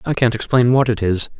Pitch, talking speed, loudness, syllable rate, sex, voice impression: 115 Hz, 260 wpm, -16 LUFS, 5.7 syllables/s, male, masculine, adult-like, tensed, powerful, slightly bright, clear, fluent, intellectual, calm, wild, lively, slightly strict